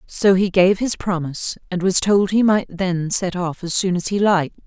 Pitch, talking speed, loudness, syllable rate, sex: 185 Hz, 230 wpm, -19 LUFS, 4.9 syllables/s, female